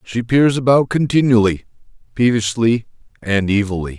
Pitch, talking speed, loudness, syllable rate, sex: 115 Hz, 105 wpm, -16 LUFS, 4.9 syllables/s, male